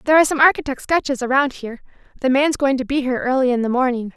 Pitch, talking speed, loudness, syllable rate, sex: 265 Hz, 245 wpm, -18 LUFS, 7.5 syllables/s, female